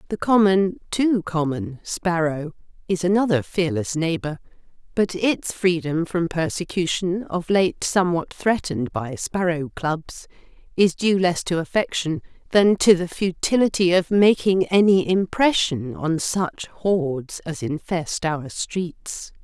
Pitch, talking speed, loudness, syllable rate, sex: 175 Hz, 125 wpm, -21 LUFS, 3.9 syllables/s, female